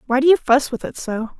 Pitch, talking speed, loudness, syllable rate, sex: 260 Hz, 300 wpm, -18 LUFS, 6.1 syllables/s, female